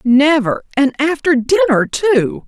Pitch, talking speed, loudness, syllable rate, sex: 285 Hz, 120 wpm, -14 LUFS, 3.7 syllables/s, female